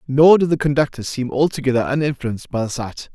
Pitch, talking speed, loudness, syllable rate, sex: 135 Hz, 190 wpm, -18 LUFS, 6.0 syllables/s, male